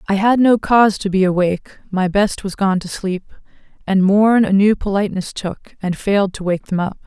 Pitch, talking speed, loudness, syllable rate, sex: 195 Hz, 210 wpm, -17 LUFS, 5.1 syllables/s, female